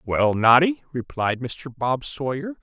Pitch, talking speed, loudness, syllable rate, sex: 135 Hz, 135 wpm, -22 LUFS, 3.8 syllables/s, male